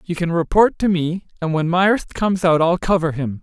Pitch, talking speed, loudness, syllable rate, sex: 175 Hz, 230 wpm, -18 LUFS, 5.0 syllables/s, male